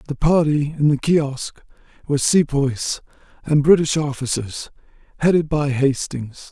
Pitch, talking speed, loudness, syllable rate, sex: 145 Hz, 120 wpm, -19 LUFS, 4.3 syllables/s, male